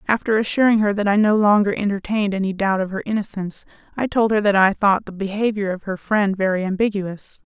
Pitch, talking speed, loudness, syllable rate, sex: 200 Hz, 205 wpm, -19 LUFS, 6.0 syllables/s, female